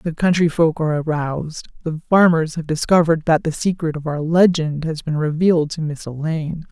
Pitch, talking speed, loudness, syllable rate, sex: 160 Hz, 190 wpm, -19 LUFS, 5.5 syllables/s, female